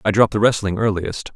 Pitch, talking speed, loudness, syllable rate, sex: 105 Hz, 220 wpm, -19 LUFS, 6.4 syllables/s, male